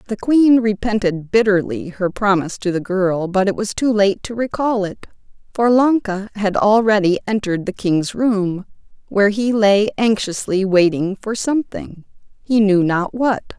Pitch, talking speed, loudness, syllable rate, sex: 205 Hz, 160 wpm, -17 LUFS, 4.7 syllables/s, female